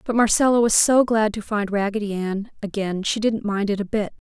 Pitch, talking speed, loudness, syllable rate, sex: 210 Hz, 225 wpm, -21 LUFS, 5.3 syllables/s, female